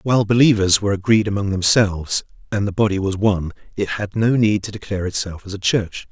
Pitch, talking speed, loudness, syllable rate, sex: 100 Hz, 205 wpm, -19 LUFS, 6.2 syllables/s, male